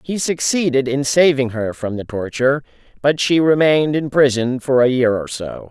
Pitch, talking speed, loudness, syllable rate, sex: 135 Hz, 190 wpm, -17 LUFS, 5.0 syllables/s, male